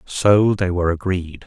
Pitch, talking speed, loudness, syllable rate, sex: 95 Hz, 165 wpm, -18 LUFS, 4.4 syllables/s, male